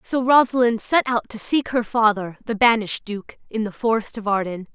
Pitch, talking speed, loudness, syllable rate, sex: 225 Hz, 200 wpm, -20 LUFS, 5.3 syllables/s, female